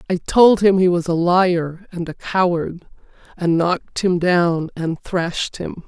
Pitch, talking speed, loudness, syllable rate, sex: 175 Hz, 175 wpm, -18 LUFS, 4.0 syllables/s, female